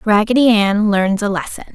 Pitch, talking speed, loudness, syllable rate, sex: 210 Hz, 170 wpm, -15 LUFS, 5.1 syllables/s, female